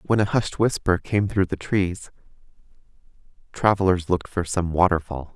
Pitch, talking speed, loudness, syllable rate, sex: 95 Hz, 145 wpm, -22 LUFS, 5.0 syllables/s, male